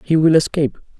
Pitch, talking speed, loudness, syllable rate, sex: 155 Hz, 180 wpm, -16 LUFS, 6.8 syllables/s, male